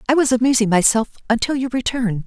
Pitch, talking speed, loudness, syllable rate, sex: 240 Hz, 185 wpm, -18 LUFS, 6.5 syllables/s, female